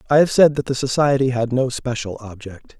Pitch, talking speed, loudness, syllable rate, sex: 130 Hz, 215 wpm, -18 LUFS, 5.4 syllables/s, male